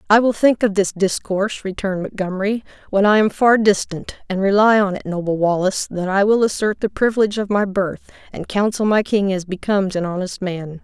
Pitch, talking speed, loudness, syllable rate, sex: 200 Hz, 205 wpm, -18 LUFS, 5.6 syllables/s, female